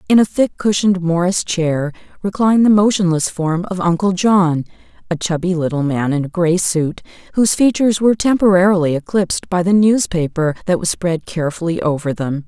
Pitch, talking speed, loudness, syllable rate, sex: 180 Hz, 170 wpm, -16 LUFS, 5.5 syllables/s, female